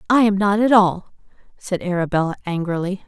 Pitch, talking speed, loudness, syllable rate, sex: 190 Hz, 155 wpm, -19 LUFS, 5.6 syllables/s, female